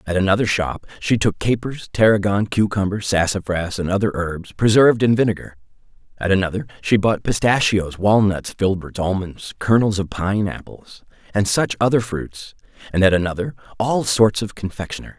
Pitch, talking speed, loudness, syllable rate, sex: 100 Hz, 150 wpm, -19 LUFS, 5.2 syllables/s, male